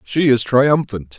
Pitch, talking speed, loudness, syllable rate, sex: 125 Hz, 150 wpm, -15 LUFS, 3.7 syllables/s, male